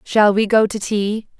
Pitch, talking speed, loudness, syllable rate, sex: 210 Hz, 215 wpm, -17 LUFS, 4.1 syllables/s, female